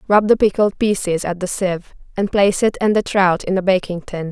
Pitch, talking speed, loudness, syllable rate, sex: 190 Hz, 235 wpm, -17 LUFS, 5.5 syllables/s, female